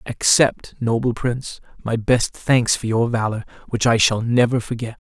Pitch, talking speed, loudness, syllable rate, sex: 120 Hz, 165 wpm, -19 LUFS, 4.6 syllables/s, male